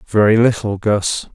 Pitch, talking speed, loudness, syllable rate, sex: 105 Hz, 135 wpm, -16 LUFS, 4.1 syllables/s, male